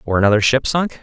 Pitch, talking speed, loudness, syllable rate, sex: 125 Hz, 235 wpm, -16 LUFS, 6.5 syllables/s, male